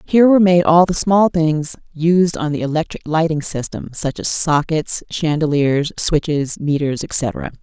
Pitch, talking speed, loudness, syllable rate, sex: 160 Hz, 155 wpm, -17 LUFS, 4.4 syllables/s, female